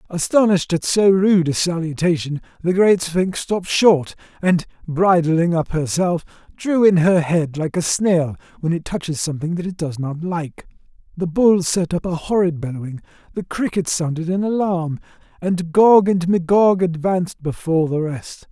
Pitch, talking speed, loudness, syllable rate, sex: 170 Hz, 165 wpm, -18 LUFS, 4.7 syllables/s, male